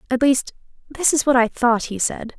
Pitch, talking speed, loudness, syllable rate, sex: 250 Hz, 225 wpm, -19 LUFS, 5.0 syllables/s, female